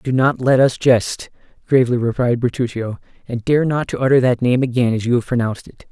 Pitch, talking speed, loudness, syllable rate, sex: 125 Hz, 215 wpm, -17 LUFS, 5.8 syllables/s, male